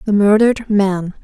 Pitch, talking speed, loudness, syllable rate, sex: 205 Hz, 145 wpm, -14 LUFS, 4.8 syllables/s, female